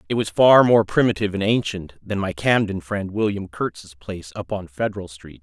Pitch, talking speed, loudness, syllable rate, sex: 100 Hz, 200 wpm, -20 LUFS, 5.2 syllables/s, male